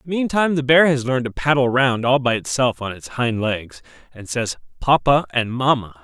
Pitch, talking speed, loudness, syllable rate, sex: 130 Hz, 200 wpm, -19 LUFS, 5.2 syllables/s, male